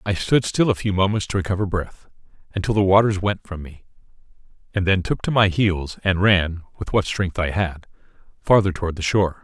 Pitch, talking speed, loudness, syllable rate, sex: 95 Hz, 210 wpm, -21 LUFS, 5.5 syllables/s, male